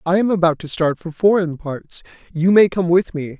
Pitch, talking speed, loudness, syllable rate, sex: 170 Hz, 230 wpm, -17 LUFS, 5.1 syllables/s, male